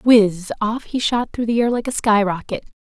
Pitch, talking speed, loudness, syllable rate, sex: 220 Hz, 225 wpm, -19 LUFS, 4.7 syllables/s, female